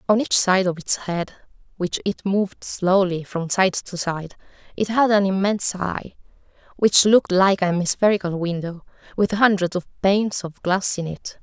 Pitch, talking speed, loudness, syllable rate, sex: 190 Hz, 175 wpm, -20 LUFS, 4.8 syllables/s, female